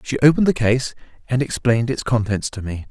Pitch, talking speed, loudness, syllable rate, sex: 125 Hz, 205 wpm, -19 LUFS, 6.2 syllables/s, male